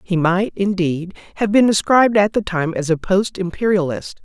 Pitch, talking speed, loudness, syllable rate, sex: 190 Hz, 185 wpm, -17 LUFS, 5.0 syllables/s, female